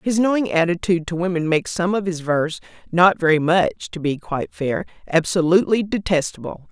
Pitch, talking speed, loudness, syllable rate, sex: 175 Hz, 150 wpm, -20 LUFS, 6.0 syllables/s, female